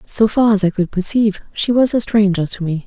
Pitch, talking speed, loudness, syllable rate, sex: 205 Hz, 250 wpm, -16 LUFS, 5.6 syllables/s, female